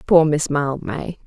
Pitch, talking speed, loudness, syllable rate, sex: 150 Hz, 140 wpm, -20 LUFS, 3.7 syllables/s, female